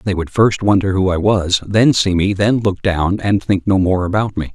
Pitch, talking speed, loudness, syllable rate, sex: 95 Hz, 250 wpm, -15 LUFS, 4.8 syllables/s, male